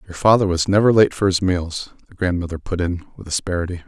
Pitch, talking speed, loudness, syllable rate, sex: 90 Hz, 215 wpm, -19 LUFS, 6.3 syllables/s, male